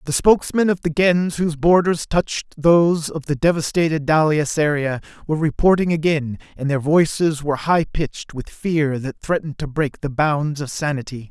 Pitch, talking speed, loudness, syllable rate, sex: 155 Hz, 175 wpm, -19 LUFS, 5.1 syllables/s, male